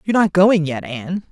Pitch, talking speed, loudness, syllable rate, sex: 175 Hz, 230 wpm, -17 LUFS, 6.0 syllables/s, female